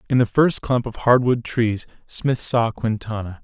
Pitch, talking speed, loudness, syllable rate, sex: 115 Hz, 190 wpm, -20 LUFS, 4.3 syllables/s, male